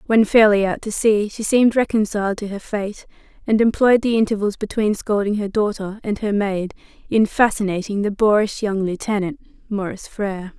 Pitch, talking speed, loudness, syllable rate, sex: 210 Hz, 170 wpm, -19 LUFS, 5.4 syllables/s, female